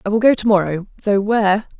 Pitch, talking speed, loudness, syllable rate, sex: 205 Hz, 235 wpm, -17 LUFS, 6.4 syllables/s, female